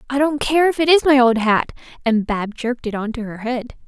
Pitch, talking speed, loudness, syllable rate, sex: 250 Hz, 265 wpm, -18 LUFS, 5.6 syllables/s, female